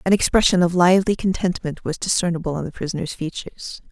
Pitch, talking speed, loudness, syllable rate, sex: 170 Hz, 170 wpm, -20 LUFS, 6.4 syllables/s, female